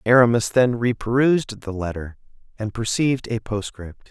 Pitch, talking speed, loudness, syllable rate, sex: 115 Hz, 130 wpm, -21 LUFS, 5.0 syllables/s, male